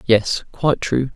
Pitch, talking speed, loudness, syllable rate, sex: 125 Hz, 155 wpm, -19 LUFS, 4.3 syllables/s, male